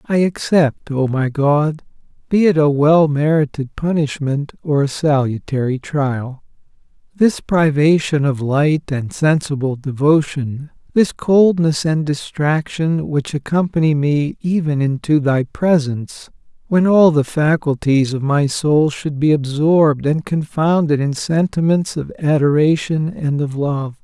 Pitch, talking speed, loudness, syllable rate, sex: 150 Hz, 125 wpm, -16 LUFS, 4.0 syllables/s, male